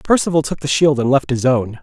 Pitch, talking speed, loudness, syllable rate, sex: 140 Hz, 265 wpm, -16 LUFS, 5.8 syllables/s, male